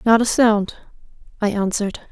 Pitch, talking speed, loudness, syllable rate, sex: 215 Hz, 140 wpm, -19 LUFS, 4.8 syllables/s, female